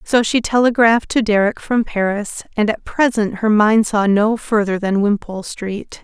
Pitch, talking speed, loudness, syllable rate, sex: 215 Hz, 180 wpm, -17 LUFS, 4.7 syllables/s, female